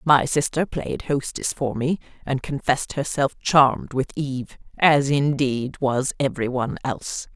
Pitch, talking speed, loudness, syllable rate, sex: 135 Hz, 145 wpm, -22 LUFS, 4.7 syllables/s, female